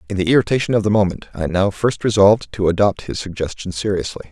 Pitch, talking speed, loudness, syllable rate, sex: 100 Hz, 210 wpm, -18 LUFS, 6.5 syllables/s, male